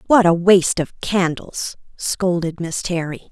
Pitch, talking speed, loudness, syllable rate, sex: 175 Hz, 145 wpm, -19 LUFS, 4.1 syllables/s, female